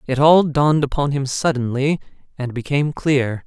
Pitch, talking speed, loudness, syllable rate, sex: 140 Hz, 155 wpm, -18 LUFS, 5.1 syllables/s, male